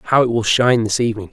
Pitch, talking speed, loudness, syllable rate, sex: 115 Hz, 275 wpm, -16 LUFS, 7.1 syllables/s, male